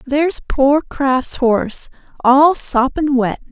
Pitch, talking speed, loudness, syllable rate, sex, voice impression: 270 Hz, 120 wpm, -15 LUFS, 3.5 syllables/s, female, feminine, adult-like, slightly calm, slightly sweet